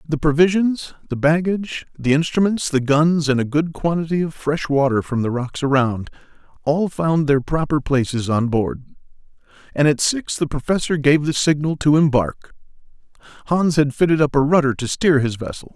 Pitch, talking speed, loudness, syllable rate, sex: 150 Hz, 175 wpm, -19 LUFS, 5.0 syllables/s, male